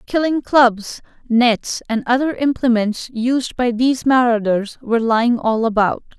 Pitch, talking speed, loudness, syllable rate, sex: 240 Hz, 135 wpm, -17 LUFS, 4.4 syllables/s, female